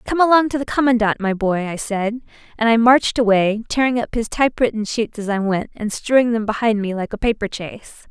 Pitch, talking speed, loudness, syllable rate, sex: 225 Hz, 220 wpm, -18 LUFS, 5.8 syllables/s, female